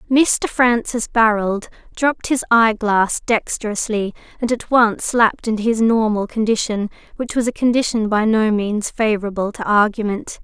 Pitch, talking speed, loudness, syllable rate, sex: 220 Hz, 140 wpm, -18 LUFS, 4.7 syllables/s, female